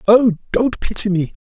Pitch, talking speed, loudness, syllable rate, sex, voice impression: 210 Hz, 170 wpm, -16 LUFS, 4.6 syllables/s, male, masculine, very adult-like, sincere, slightly mature, elegant, slightly sweet